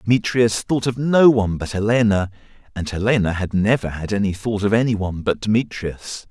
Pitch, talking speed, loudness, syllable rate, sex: 105 Hz, 170 wpm, -19 LUFS, 5.4 syllables/s, male